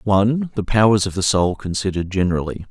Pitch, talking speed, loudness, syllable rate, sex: 100 Hz, 175 wpm, -19 LUFS, 6.6 syllables/s, male